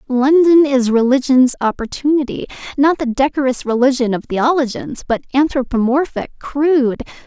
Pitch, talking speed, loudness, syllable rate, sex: 265 Hz, 100 wpm, -15 LUFS, 5.0 syllables/s, female